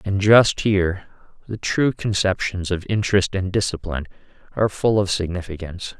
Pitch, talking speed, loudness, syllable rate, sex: 95 Hz, 140 wpm, -20 LUFS, 5.3 syllables/s, male